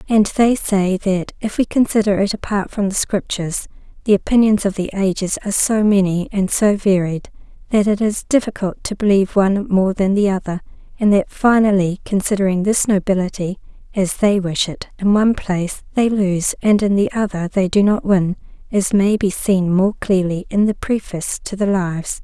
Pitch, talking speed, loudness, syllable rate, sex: 195 Hz, 185 wpm, -17 LUFS, 5.2 syllables/s, female